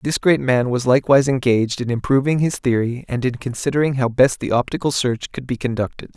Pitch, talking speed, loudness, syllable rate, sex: 130 Hz, 205 wpm, -19 LUFS, 6.0 syllables/s, male